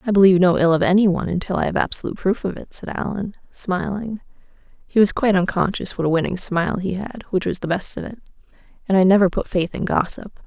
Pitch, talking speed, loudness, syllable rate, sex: 190 Hz, 210 wpm, -20 LUFS, 6.4 syllables/s, female